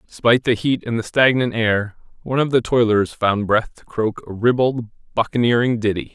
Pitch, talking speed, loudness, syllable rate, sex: 115 Hz, 185 wpm, -19 LUFS, 5.4 syllables/s, male